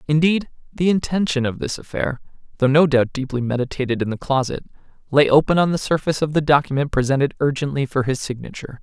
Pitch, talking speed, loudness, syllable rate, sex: 140 Hz, 185 wpm, -20 LUFS, 6.3 syllables/s, male